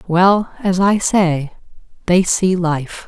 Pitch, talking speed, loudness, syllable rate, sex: 180 Hz, 135 wpm, -16 LUFS, 3.1 syllables/s, female